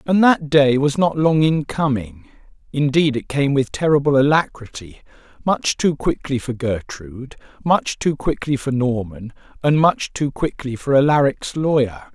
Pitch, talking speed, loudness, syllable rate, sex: 140 Hz, 155 wpm, -19 LUFS, 4.5 syllables/s, male